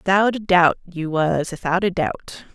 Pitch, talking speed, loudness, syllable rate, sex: 180 Hz, 120 wpm, -20 LUFS, 3.4 syllables/s, female